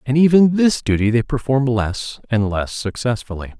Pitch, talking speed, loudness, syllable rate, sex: 125 Hz, 165 wpm, -18 LUFS, 4.8 syllables/s, male